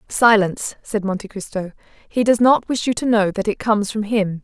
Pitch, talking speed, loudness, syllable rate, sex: 210 Hz, 215 wpm, -19 LUFS, 5.3 syllables/s, female